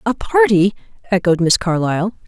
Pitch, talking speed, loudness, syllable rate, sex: 200 Hz, 130 wpm, -16 LUFS, 5.3 syllables/s, female